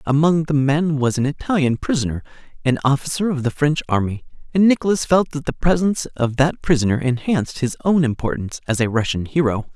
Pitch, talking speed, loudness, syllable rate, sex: 140 Hz, 185 wpm, -19 LUFS, 5.9 syllables/s, male